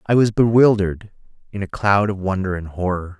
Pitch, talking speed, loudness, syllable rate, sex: 100 Hz, 190 wpm, -18 LUFS, 5.6 syllables/s, male